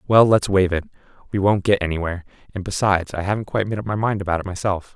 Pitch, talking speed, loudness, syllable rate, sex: 95 Hz, 230 wpm, -21 LUFS, 7.5 syllables/s, male